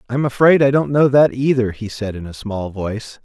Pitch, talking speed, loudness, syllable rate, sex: 120 Hz, 240 wpm, -17 LUFS, 5.3 syllables/s, male